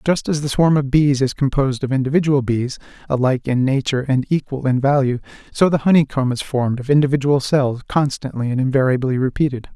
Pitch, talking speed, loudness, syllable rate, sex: 135 Hz, 185 wpm, -18 LUFS, 6.1 syllables/s, male